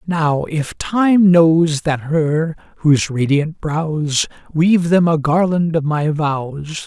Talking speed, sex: 140 wpm, male